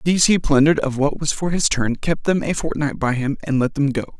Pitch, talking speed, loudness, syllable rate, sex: 145 Hz, 270 wpm, -19 LUFS, 5.7 syllables/s, male